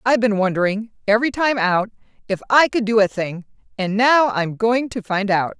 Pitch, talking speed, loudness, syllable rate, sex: 215 Hz, 205 wpm, -19 LUFS, 5.3 syllables/s, female